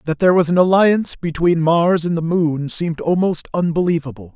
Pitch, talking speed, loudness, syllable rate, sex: 170 Hz, 180 wpm, -17 LUFS, 5.5 syllables/s, male